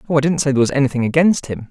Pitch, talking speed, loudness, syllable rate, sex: 140 Hz, 315 wpm, -16 LUFS, 8.5 syllables/s, male